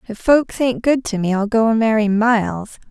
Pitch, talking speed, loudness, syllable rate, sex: 225 Hz, 225 wpm, -17 LUFS, 5.1 syllables/s, female